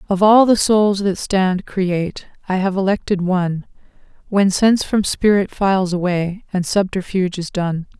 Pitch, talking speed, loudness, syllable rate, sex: 190 Hz, 160 wpm, -17 LUFS, 4.7 syllables/s, female